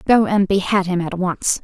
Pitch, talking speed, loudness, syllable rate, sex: 190 Hz, 220 wpm, -18 LUFS, 4.8 syllables/s, female